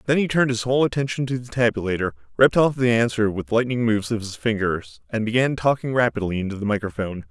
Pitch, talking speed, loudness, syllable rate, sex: 115 Hz, 215 wpm, -22 LUFS, 6.8 syllables/s, male